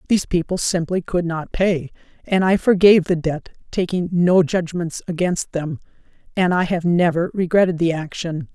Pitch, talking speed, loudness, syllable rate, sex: 175 Hz, 160 wpm, -19 LUFS, 4.9 syllables/s, female